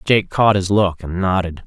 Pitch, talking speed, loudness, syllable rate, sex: 95 Hz, 215 wpm, -17 LUFS, 4.5 syllables/s, male